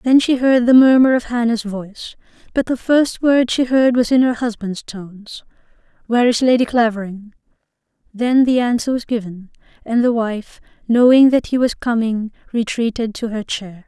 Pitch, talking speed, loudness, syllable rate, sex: 235 Hz, 175 wpm, -16 LUFS, 4.9 syllables/s, female